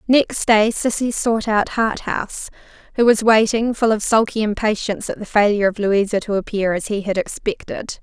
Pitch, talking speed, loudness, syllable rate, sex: 215 Hz, 180 wpm, -18 LUFS, 5.2 syllables/s, female